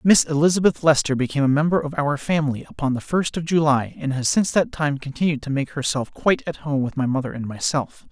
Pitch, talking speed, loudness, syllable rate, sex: 145 Hz, 230 wpm, -21 LUFS, 6.2 syllables/s, male